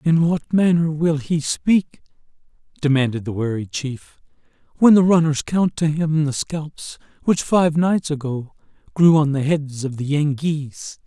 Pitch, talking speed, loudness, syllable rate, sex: 150 Hz, 155 wpm, -19 LUFS, 4.2 syllables/s, male